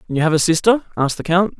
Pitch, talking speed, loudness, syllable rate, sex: 175 Hz, 265 wpm, -17 LUFS, 7.1 syllables/s, male